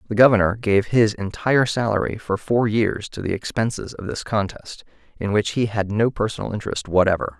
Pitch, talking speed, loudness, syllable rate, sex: 105 Hz, 185 wpm, -21 LUFS, 5.5 syllables/s, male